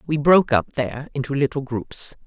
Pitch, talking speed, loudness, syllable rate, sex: 135 Hz, 185 wpm, -21 LUFS, 5.6 syllables/s, female